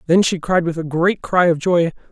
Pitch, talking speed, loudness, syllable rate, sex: 170 Hz, 255 wpm, -17 LUFS, 5.1 syllables/s, male